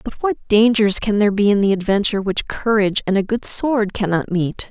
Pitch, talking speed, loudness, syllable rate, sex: 210 Hz, 215 wpm, -17 LUFS, 5.5 syllables/s, female